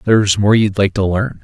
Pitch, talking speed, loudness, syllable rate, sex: 100 Hz, 250 wpm, -14 LUFS, 5.4 syllables/s, male